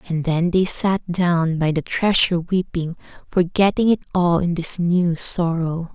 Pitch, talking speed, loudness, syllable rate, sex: 175 Hz, 160 wpm, -20 LUFS, 4.1 syllables/s, female